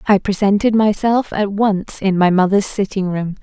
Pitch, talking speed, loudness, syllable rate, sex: 200 Hz, 175 wpm, -16 LUFS, 4.7 syllables/s, female